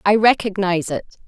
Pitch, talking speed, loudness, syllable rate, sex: 195 Hz, 140 wpm, -19 LUFS, 6.1 syllables/s, female